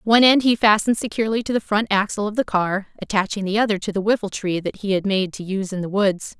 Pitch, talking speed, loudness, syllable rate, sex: 205 Hz, 255 wpm, -20 LUFS, 6.6 syllables/s, female